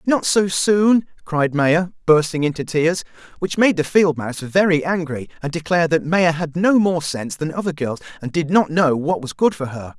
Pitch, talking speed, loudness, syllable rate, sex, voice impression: 165 Hz, 210 wpm, -19 LUFS, 5.0 syllables/s, male, masculine, adult-like, tensed, powerful, bright, slightly halting, raspy, cool, friendly, wild, lively, intense, sharp